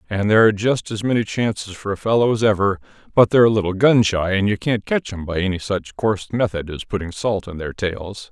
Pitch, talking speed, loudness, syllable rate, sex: 100 Hz, 240 wpm, -19 LUFS, 5.8 syllables/s, male